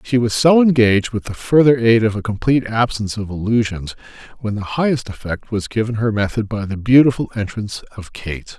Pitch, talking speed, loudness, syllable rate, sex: 110 Hz, 195 wpm, -17 LUFS, 5.7 syllables/s, male